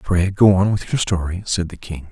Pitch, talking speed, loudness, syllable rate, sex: 90 Hz, 255 wpm, -18 LUFS, 5.1 syllables/s, male